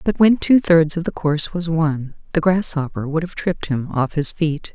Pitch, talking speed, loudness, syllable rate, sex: 160 Hz, 230 wpm, -19 LUFS, 5.0 syllables/s, female